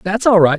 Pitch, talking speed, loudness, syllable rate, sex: 195 Hz, 305 wpm, -13 LUFS, 5.6 syllables/s, male